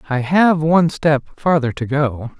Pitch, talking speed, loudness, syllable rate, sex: 150 Hz, 175 wpm, -16 LUFS, 4.5 syllables/s, male